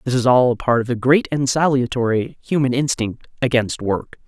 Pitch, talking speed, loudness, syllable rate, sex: 125 Hz, 195 wpm, -19 LUFS, 5.1 syllables/s, female